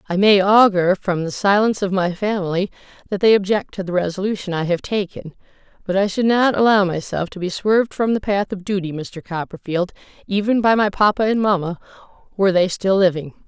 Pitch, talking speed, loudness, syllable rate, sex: 195 Hz, 195 wpm, -18 LUFS, 5.7 syllables/s, female